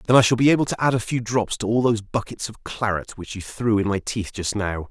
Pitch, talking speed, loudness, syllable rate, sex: 110 Hz, 295 wpm, -22 LUFS, 6.0 syllables/s, male